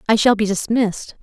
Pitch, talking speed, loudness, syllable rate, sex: 215 Hz, 195 wpm, -18 LUFS, 5.9 syllables/s, female